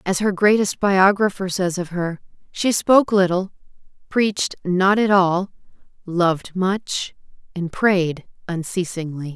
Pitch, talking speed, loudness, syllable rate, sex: 185 Hz, 120 wpm, -20 LUFS, 4.0 syllables/s, female